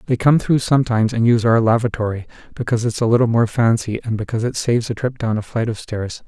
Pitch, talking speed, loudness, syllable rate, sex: 115 Hz, 240 wpm, -18 LUFS, 6.7 syllables/s, male